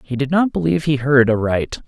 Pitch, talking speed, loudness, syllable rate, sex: 135 Hz, 225 wpm, -17 LUFS, 5.8 syllables/s, male